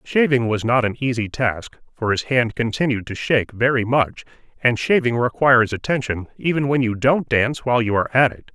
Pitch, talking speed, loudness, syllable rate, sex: 120 Hz, 195 wpm, -19 LUFS, 5.5 syllables/s, male